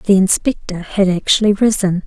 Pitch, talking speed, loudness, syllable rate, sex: 195 Hz, 145 wpm, -15 LUFS, 4.9 syllables/s, female